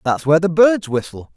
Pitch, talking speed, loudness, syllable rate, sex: 160 Hz, 175 wpm, -16 LUFS, 4.9 syllables/s, male